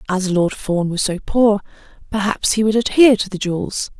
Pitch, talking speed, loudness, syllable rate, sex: 205 Hz, 195 wpm, -17 LUFS, 5.3 syllables/s, female